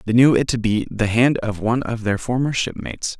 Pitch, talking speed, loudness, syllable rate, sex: 115 Hz, 245 wpm, -20 LUFS, 5.6 syllables/s, male